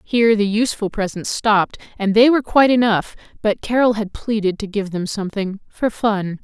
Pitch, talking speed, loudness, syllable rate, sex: 210 Hz, 185 wpm, -18 LUFS, 5.5 syllables/s, female